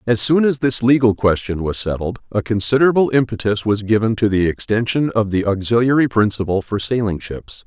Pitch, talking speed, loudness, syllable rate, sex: 110 Hz, 180 wpm, -17 LUFS, 5.5 syllables/s, male